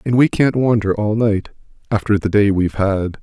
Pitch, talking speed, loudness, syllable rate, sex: 105 Hz, 185 wpm, -17 LUFS, 5.2 syllables/s, male